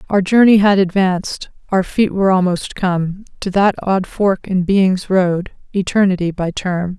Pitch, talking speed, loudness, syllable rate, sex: 190 Hz, 165 wpm, -16 LUFS, 4.3 syllables/s, female